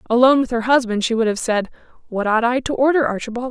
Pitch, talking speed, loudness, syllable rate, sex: 240 Hz, 240 wpm, -18 LUFS, 6.6 syllables/s, female